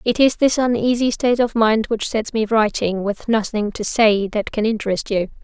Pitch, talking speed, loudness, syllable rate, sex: 220 Hz, 210 wpm, -18 LUFS, 5.0 syllables/s, female